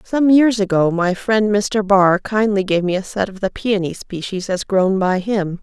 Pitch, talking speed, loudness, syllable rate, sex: 200 Hz, 215 wpm, -17 LUFS, 4.3 syllables/s, female